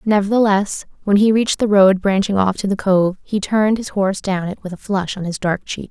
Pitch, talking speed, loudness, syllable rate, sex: 200 Hz, 245 wpm, -17 LUFS, 5.6 syllables/s, female